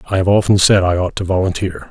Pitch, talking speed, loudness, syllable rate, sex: 95 Hz, 250 wpm, -15 LUFS, 6.5 syllables/s, male